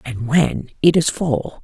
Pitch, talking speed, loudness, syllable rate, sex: 140 Hz, 185 wpm, -18 LUFS, 3.8 syllables/s, female